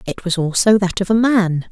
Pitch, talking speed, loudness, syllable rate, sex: 195 Hz, 245 wpm, -16 LUFS, 5.1 syllables/s, female